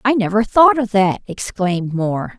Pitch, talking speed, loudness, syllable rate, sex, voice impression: 210 Hz, 175 wpm, -16 LUFS, 4.9 syllables/s, female, feminine, slightly adult-like, slightly cute, friendly, slightly unique